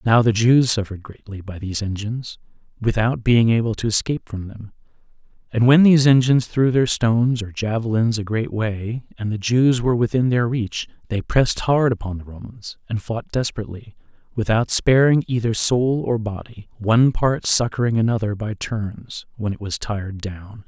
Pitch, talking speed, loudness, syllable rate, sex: 115 Hz, 175 wpm, -20 LUFS, 5.2 syllables/s, male